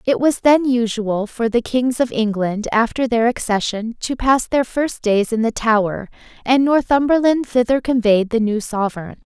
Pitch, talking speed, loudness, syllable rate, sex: 235 Hz, 175 wpm, -18 LUFS, 4.6 syllables/s, female